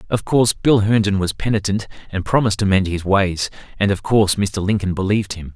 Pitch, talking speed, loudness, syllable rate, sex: 100 Hz, 205 wpm, -18 LUFS, 6.0 syllables/s, male